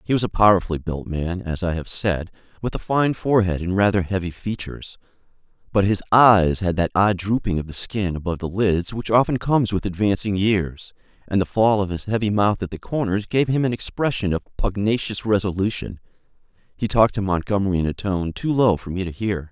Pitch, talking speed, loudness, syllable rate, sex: 100 Hz, 205 wpm, -21 LUFS, 5.7 syllables/s, male